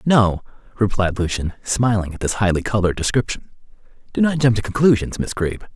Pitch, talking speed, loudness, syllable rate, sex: 105 Hz, 165 wpm, -20 LUFS, 5.8 syllables/s, male